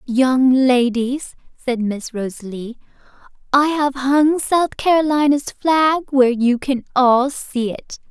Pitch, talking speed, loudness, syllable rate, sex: 265 Hz, 125 wpm, -17 LUFS, 3.5 syllables/s, female